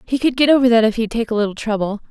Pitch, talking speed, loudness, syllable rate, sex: 230 Hz, 315 wpm, -17 LUFS, 7.3 syllables/s, female